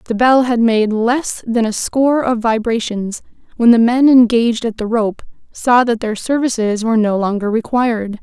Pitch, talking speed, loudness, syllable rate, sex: 230 Hz, 180 wpm, -15 LUFS, 4.8 syllables/s, female